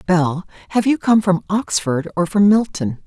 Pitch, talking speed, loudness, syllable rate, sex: 185 Hz, 155 wpm, -17 LUFS, 4.4 syllables/s, female